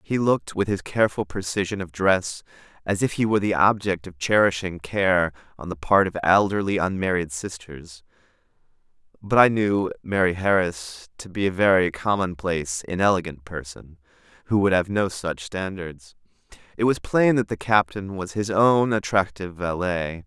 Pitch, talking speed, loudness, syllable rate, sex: 95 Hz, 160 wpm, -22 LUFS, 4.9 syllables/s, male